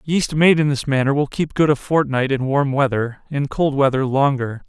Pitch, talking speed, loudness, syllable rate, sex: 140 Hz, 220 wpm, -18 LUFS, 4.9 syllables/s, male